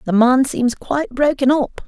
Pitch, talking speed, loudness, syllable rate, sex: 260 Hz, 190 wpm, -17 LUFS, 4.6 syllables/s, female